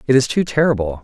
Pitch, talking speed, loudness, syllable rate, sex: 125 Hz, 230 wpm, -17 LUFS, 6.7 syllables/s, male